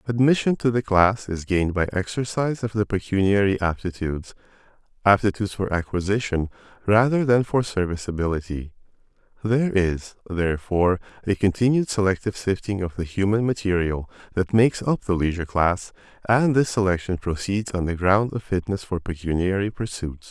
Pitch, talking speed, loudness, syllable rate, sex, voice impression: 100 Hz, 140 wpm, -23 LUFS, 5.6 syllables/s, male, masculine, adult-like, tensed, soft, fluent, cool, sincere, calm, wild, kind